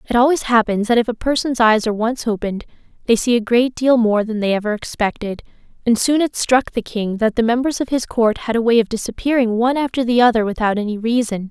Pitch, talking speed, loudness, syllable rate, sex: 230 Hz, 235 wpm, -17 LUFS, 6.1 syllables/s, female